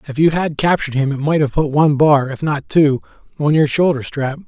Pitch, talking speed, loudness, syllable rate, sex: 145 Hz, 240 wpm, -16 LUFS, 5.7 syllables/s, male